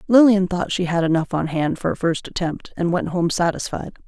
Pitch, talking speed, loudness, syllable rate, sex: 175 Hz, 220 wpm, -21 LUFS, 5.4 syllables/s, female